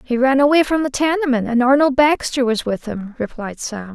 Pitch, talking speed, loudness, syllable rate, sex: 255 Hz, 215 wpm, -17 LUFS, 5.2 syllables/s, female